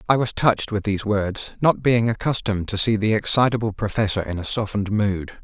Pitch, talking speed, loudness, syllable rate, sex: 105 Hz, 200 wpm, -21 LUFS, 5.9 syllables/s, male